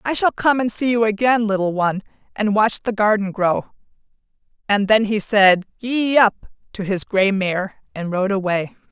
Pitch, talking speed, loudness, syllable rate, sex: 210 Hz, 180 wpm, -18 LUFS, 4.7 syllables/s, female